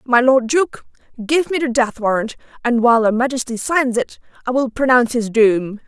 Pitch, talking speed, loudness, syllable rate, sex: 245 Hz, 195 wpm, -17 LUFS, 5.2 syllables/s, female